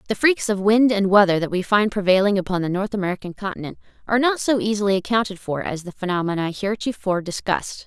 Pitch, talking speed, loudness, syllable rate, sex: 200 Hz, 200 wpm, -21 LUFS, 6.7 syllables/s, female